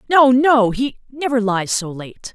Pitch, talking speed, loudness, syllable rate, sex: 240 Hz, 130 wpm, -16 LUFS, 3.9 syllables/s, female